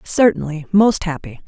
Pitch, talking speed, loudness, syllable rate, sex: 180 Hz, 120 wpm, -17 LUFS, 4.7 syllables/s, female